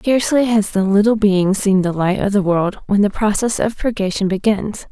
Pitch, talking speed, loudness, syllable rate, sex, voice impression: 205 Hz, 210 wpm, -16 LUFS, 5.0 syllables/s, female, feminine, adult-like, slightly relaxed, powerful, slightly muffled, raspy, intellectual, calm, friendly, reassuring, elegant, slightly lively, kind